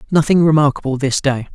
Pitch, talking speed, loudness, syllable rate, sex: 145 Hz, 155 wpm, -15 LUFS, 6.3 syllables/s, male